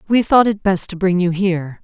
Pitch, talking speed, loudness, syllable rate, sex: 190 Hz, 260 wpm, -16 LUFS, 5.4 syllables/s, female